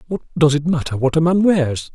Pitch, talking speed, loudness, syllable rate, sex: 155 Hz, 245 wpm, -17 LUFS, 5.5 syllables/s, male